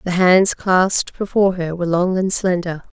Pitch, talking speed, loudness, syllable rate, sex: 180 Hz, 180 wpm, -17 LUFS, 5.1 syllables/s, female